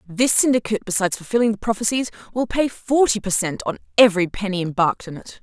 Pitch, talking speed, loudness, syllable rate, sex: 210 Hz, 190 wpm, -20 LUFS, 6.6 syllables/s, female